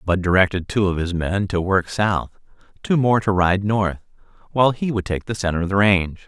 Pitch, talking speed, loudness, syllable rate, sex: 95 Hz, 220 wpm, -20 LUFS, 5.5 syllables/s, male